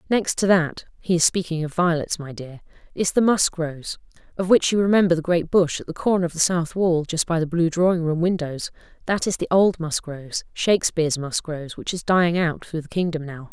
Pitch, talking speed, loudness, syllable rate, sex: 170 Hz, 215 wpm, -22 LUFS, 5.4 syllables/s, female